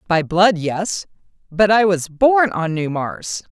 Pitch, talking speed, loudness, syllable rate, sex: 185 Hz, 150 wpm, -17 LUFS, 3.5 syllables/s, female